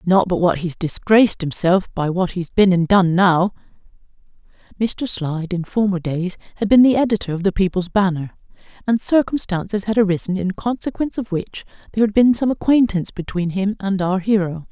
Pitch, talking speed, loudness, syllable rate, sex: 195 Hz, 180 wpm, -18 LUFS, 5.5 syllables/s, female